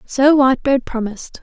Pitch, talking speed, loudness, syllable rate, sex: 260 Hz, 125 wpm, -16 LUFS, 5.3 syllables/s, female